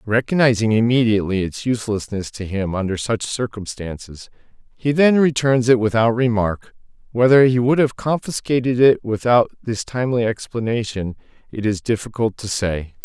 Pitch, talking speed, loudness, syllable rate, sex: 115 Hz, 140 wpm, -19 LUFS, 5.1 syllables/s, male